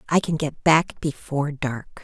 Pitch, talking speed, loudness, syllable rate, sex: 150 Hz, 175 wpm, -23 LUFS, 4.7 syllables/s, female